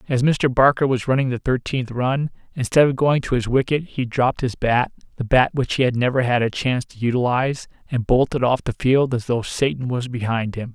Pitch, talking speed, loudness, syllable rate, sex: 125 Hz, 210 wpm, -20 LUFS, 5.5 syllables/s, male